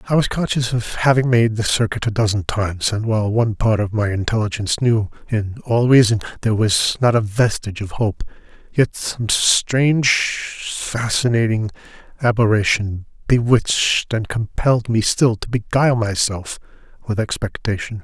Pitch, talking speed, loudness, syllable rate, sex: 110 Hz, 145 wpm, -18 LUFS, 4.9 syllables/s, male